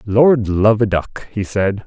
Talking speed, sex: 195 wpm, male